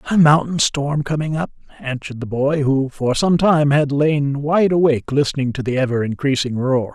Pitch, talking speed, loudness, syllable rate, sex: 140 Hz, 190 wpm, -18 LUFS, 5.1 syllables/s, male